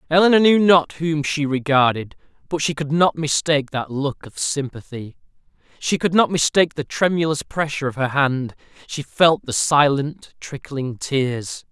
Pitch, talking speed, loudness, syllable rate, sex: 145 Hz, 160 wpm, -19 LUFS, 4.6 syllables/s, male